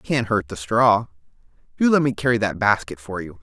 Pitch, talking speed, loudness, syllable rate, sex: 110 Hz, 230 wpm, -20 LUFS, 5.6 syllables/s, male